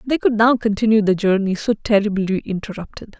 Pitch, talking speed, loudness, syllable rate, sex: 210 Hz, 170 wpm, -18 LUFS, 5.6 syllables/s, female